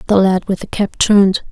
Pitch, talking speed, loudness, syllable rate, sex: 195 Hz, 240 wpm, -14 LUFS, 5.5 syllables/s, female